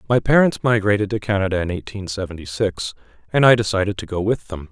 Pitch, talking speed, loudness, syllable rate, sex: 100 Hz, 205 wpm, -20 LUFS, 6.3 syllables/s, male